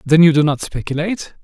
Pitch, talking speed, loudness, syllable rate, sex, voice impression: 155 Hz, 210 wpm, -16 LUFS, 6.4 syllables/s, male, masculine, adult-like, tensed, powerful, bright, clear, intellectual, slightly refreshing, friendly, slightly wild, lively